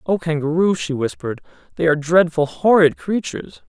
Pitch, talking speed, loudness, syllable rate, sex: 150 Hz, 145 wpm, -18 LUFS, 5.6 syllables/s, male